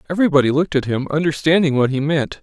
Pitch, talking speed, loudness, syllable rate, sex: 150 Hz, 200 wpm, -17 LUFS, 7.3 syllables/s, male